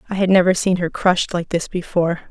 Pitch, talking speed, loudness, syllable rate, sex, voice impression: 180 Hz, 235 wpm, -18 LUFS, 6.4 syllables/s, female, feminine, middle-aged, slightly soft, slightly muffled, intellectual, slightly elegant